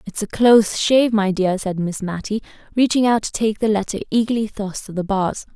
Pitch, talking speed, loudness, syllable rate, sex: 210 Hz, 215 wpm, -19 LUFS, 5.5 syllables/s, female